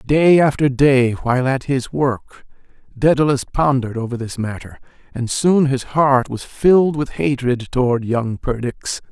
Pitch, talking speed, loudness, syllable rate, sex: 135 Hz, 150 wpm, -17 LUFS, 4.3 syllables/s, male